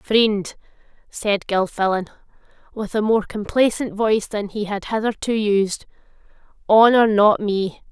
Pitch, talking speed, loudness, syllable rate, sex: 210 Hz, 120 wpm, -19 LUFS, 4.2 syllables/s, female